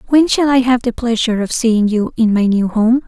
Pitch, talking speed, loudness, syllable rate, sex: 235 Hz, 255 wpm, -14 LUFS, 5.3 syllables/s, female